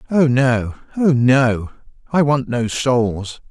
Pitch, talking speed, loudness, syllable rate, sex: 130 Hz, 135 wpm, -17 LUFS, 3.0 syllables/s, male